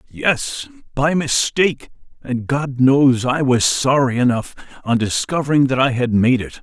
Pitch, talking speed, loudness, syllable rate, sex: 135 Hz, 155 wpm, -17 LUFS, 4.3 syllables/s, male